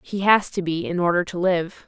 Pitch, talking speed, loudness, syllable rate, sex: 180 Hz, 255 wpm, -21 LUFS, 5.1 syllables/s, female